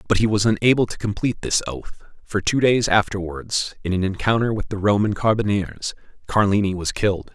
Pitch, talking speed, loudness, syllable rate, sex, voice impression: 100 Hz, 180 wpm, -21 LUFS, 5.5 syllables/s, male, masculine, adult-like, thick, tensed, powerful, slightly hard, clear, fluent, cool, intellectual, calm, mature, wild, lively, slightly strict